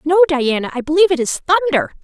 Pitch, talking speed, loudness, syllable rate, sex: 320 Hz, 205 wpm, -15 LUFS, 7.3 syllables/s, female